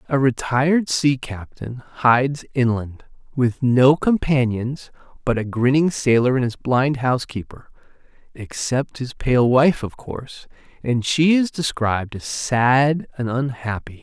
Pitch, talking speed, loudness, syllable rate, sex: 130 Hz, 135 wpm, -19 LUFS, 4.0 syllables/s, male